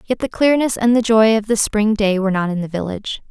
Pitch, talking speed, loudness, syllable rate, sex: 215 Hz, 270 wpm, -17 LUFS, 6.0 syllables/s, female